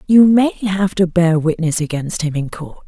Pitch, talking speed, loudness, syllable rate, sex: 175 Hz, 210 wpm, -16 LUFS, 4.4 syllables/s, female